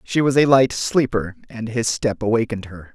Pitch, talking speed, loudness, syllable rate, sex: 115 Hz, 205 wpm, -19 LUFS, 5.2 syllables/s, male